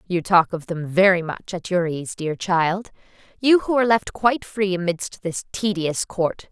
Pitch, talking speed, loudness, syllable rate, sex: 185 Hz, 185 wpm, -21 LUFS, 4.5 syllables/s, female